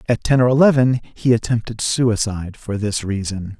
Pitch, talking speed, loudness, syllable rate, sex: 115 Hz, 165 wpm, -18 LUFS, 5.1 syllables/s, male